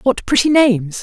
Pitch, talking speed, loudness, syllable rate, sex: 235 Hz, 175 wpm, -14 LUFS, 5.4 syllables/s, female